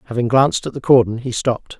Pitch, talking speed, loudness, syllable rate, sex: 125 Hz, 235 wpm, -17 LUFS, 6.9 syllables/s, male